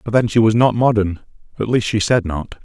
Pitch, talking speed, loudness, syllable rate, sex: 110 Hz, 250 wpm, -17 LUFS, 5.5 syllables/s, male